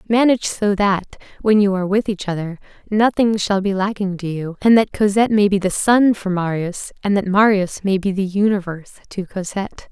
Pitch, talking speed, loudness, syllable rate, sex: 200 Hz, 200 wpm, -18 LUFS, 5.4 syllables/s, female